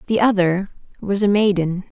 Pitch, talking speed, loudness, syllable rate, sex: 195 Hz, 150 wpm, -18 LUFS, 5.0 syllables/s, female